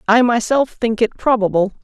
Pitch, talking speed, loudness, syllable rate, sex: 230 Hz, 165 wpm, -16 LUFS, 5.0 syllables/s, female